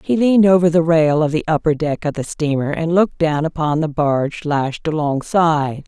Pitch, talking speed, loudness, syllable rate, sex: 160 Hz, 205 wpm, -17 LUFS, 5.2 syllables/s, female